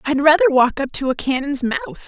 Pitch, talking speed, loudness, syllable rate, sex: 260 Hz, 230 wpm, -18 LUFS, 6.4 syllables/s, female